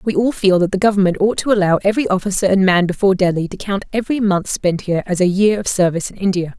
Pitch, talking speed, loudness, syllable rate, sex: 195 Hz, 255 wpm, -16 LUFS, 7.0 syllables/s, female